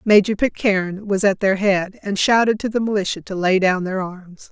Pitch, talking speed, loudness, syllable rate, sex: 200 Hz, 210 wpm, -19 LUFS, 5.0 syllables/s, female